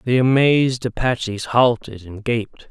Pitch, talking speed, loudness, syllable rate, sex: 120 Hz, 135 wpm, -19 LUFS, 4.3 syllables/s, male